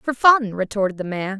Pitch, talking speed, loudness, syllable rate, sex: 215 Hz, 215 wpm, -19 LUFS, 5.2 syllables/s, female